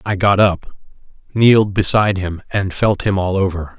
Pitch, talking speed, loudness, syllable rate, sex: 95 Hz, 175 wpm, -16 LUFS, 4.8 syllables/s, male